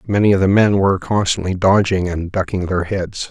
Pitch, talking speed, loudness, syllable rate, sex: 95 Hz, 200 wpm, -16 LUFS, 5.4 syllables/s, male